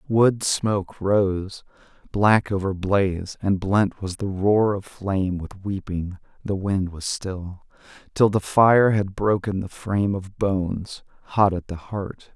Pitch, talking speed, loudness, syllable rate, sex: 100 Hz, 155 wpm, -23 LUFS, 3.7 syllables/s, male